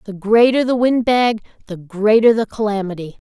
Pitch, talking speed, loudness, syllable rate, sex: 215 Hz, 165 wpm, -16 LUFS, 5.1 syllables/s, female